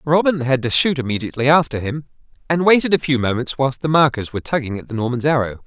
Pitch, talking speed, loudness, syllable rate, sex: 135 Hz, 220 wpm, -18 LUFS, 6.6 syllables/s, male